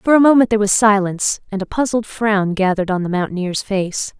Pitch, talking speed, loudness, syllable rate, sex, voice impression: 205 Hz, 215 wpm, -17 LUFS, 5.9 syllables/s, female, very feminine, slightly young, thin, slightly tensed, slightly powerful, bright, hard, clear, fluent, cute, intellectual, refreshing, very sincere, calm, very friendly, very reassuring, unique, elegant, slightly wild, very sweet, lively, kind, slightly intense, slightly sharp, slightly modest, light